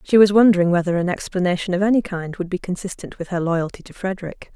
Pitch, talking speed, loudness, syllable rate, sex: 185 Hz, 225 wpm, -20 LUFS, 6.5 syllables/s, female